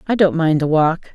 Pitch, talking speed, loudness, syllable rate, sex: 165 Hz, 260 wpm, -16 LUFS, 5.1 syllables/s, female